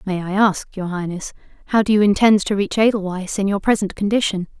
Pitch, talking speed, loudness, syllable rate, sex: 200 Hz, 210 wpm, -18 LUFS, 5.7 syllables/s, female